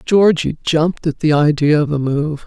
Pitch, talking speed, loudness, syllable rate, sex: 155 Hz, 195 wpm, -16 LUFS, 4.7 syllables/s, female